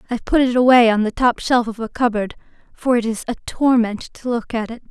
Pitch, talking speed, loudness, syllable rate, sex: 235 Hz, 245 wpm, -18 LUFS, 5.8 syllables/s, female